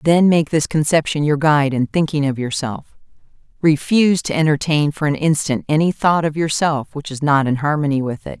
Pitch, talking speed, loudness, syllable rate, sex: 150 Hz, 195 wpm, -17 LUFS, 5.4 syllables/s, female